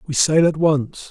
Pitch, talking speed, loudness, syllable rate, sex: 150 Hz, 215 wpm, -17 LUFS, 4.1 syllables/s, male